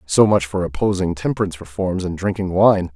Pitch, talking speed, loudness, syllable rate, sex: 95 Hz, 185 wpm, -19 LUFS, 5.7 syllables/s, male